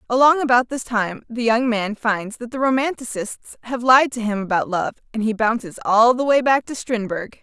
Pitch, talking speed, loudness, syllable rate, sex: 235 Hz, 210 wpm, -19 LUFS, 5.1 syllables/s, female